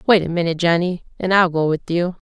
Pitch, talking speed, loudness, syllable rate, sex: 175 Hz, 240 wpm, -19 LUFS, 6.4 syllables/s, female